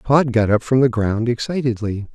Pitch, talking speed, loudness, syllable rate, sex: 120 Hz, 195 wpm, -18 LUFS, 5.0 syllables/s, male